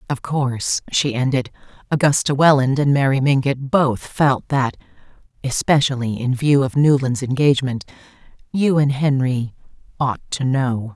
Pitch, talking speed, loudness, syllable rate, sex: 135 Hz, 130 wpm, -18 LUFS, 4.6 syllables/s, female